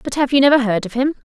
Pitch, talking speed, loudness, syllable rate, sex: 255 Hz, 320 wpm, -16 LUFS, 7.1 syllables/s, female